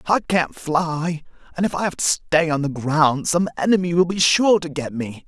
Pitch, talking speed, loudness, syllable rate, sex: 165 Hz, 225 wpm, -20 LUFS, 4.8 syllables/s, male